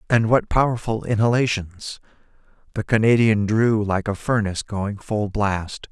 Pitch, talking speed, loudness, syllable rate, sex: 105 Hz, 130 wpm, -21 LUFS, 4.4 syllables/s, male